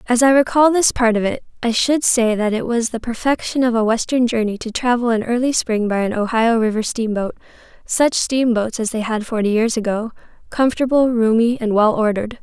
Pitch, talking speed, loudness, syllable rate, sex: 230 Hz, 200 wpm, -17 LUFS, 5.4 syllables/s, female